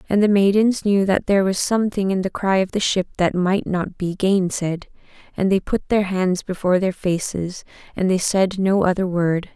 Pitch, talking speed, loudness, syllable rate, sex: 190 Hz, 205 wpm, -20 LUFS, 5.0 syllables/s, female